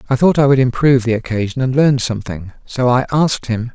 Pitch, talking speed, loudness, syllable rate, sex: 125 Hz, 225 wpm, -15 LUFS, 6.2 syllables/s, male